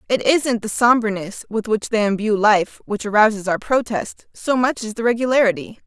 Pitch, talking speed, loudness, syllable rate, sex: 220 Hz, 185 wpm, -19 LUFS, 5.1 syllables/s, female